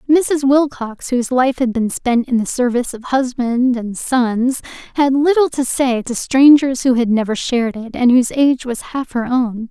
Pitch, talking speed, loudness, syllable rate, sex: 255 Hz, 200 wpm, -16 LUFS, 4.7 syllables/s, female